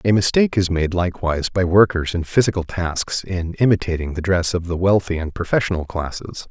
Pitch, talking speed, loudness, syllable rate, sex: 90 Hz, 185 wpm, -20 LUFS, 5.6 syllables/s, male